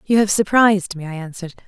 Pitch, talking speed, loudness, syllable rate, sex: 190 Hz, 215 wpm, -17 LUFS, 6.8 syllables/s, female